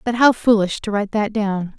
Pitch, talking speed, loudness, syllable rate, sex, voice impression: 210 Hz, 235 wpm, -18 LUFS, 5.4 syllables/s, female, feminine, slightly adult-like, slightly tensed, slightly refreshing, slightly unique